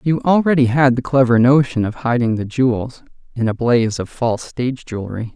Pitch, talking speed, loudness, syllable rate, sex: 125 Hz, 190 wpm, -17 LUFS, 5.9 syllables/s, male